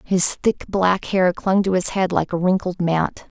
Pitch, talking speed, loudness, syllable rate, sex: 185 Hz, 215 wpm, -19 LUFS, 4.1 syllables/s, female